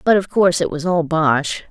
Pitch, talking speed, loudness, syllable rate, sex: 165 Hz, 245 wpm, -17 LUFS, 5.2 syllables/s, female